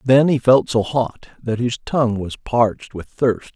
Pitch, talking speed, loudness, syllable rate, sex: 120 Hz, 200 wpm, -19 LUFS, 4.3 syllables/s, male